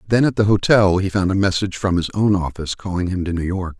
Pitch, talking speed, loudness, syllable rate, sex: 95 Hz, 270 wpm, -19 LUFS, 6.6 syllables/s, male